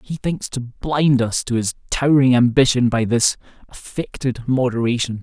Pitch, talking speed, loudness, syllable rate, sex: 125 Hz, 150 wpm, -18 LUFS, 4.7 syllables/s, male